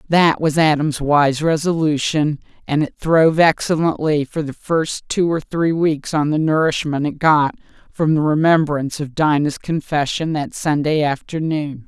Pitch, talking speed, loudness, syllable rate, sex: 155 Hz, 150 wpm, -18 LUFS, 4.4 syllables/s, female